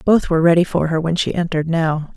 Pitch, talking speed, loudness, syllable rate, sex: 165 Hz, 250 wpm, -17 LUFS, 6.3 syllables/s, female